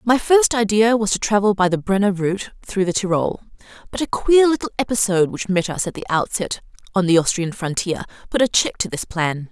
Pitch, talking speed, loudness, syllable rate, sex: 200 Hz, 215 wpm, -19 LUFS, 5.7 syllables/s, female